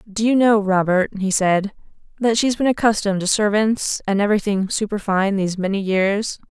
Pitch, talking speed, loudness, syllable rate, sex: 205 Hz, 165 wpm, -19 LUFS, 5.4 syllables/s, female